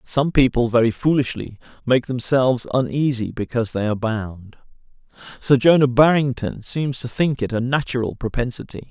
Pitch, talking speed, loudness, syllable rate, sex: 125 Hz, 140 wpm, -20 LUFS, 5.2 syllables/s, male